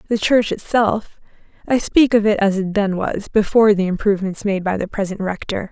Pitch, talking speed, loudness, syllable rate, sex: 205 Hz, 190 wpm, -18 LUFS, 5.3 syllables/s, female